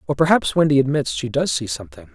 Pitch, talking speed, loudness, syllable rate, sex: 125 Hz, 225 wpm, -19 LUFS, 6.5 syllables/s, male